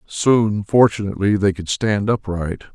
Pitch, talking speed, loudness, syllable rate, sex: 100 Hz, 130 wpm, -18 LUFS, 4.4 syllables/s, male